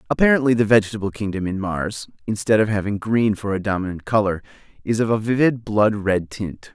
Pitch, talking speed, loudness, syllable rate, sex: 105 Hz, 185 wpm, -20 LUFS, 5.7 syllables/s, male